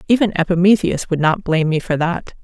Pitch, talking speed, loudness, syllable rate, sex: 175 Hz, 195 wpm, -17 LUFS, 5.9 syllables/s, female